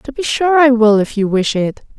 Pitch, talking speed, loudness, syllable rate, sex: 245 Hz, 270 wpm, -13 LUFS, 4.9 syllables/s, female